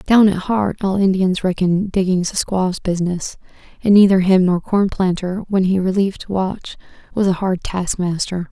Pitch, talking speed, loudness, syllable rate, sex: 190 Hz, 170 wpm, -17 LUFS, 4.8 syllables/s, female